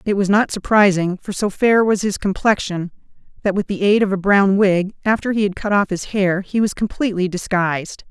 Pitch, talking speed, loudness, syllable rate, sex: 195 Hz, 215 wpm, -18 LUFS, 5.3 syllables/s, female